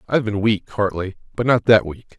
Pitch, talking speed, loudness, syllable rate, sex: 105 Hz, 220 wpm, -19 LUFS, 6.0 syllables/s, male